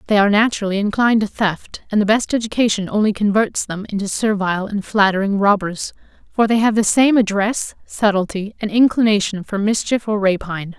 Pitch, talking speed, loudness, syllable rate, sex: 205 Hz, 170 wpm, -17 LUFS, 5.8 syllables/s, female